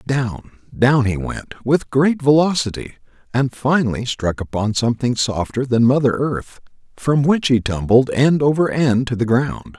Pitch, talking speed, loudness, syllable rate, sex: 130 Hz, 155 wpm, -18 LUFS, 4.4 syllables/s, male